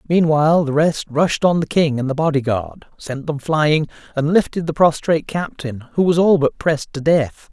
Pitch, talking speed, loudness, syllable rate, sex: 155 Hz, 200 wpm, -18 LUFS, 5.0 syllables/s, male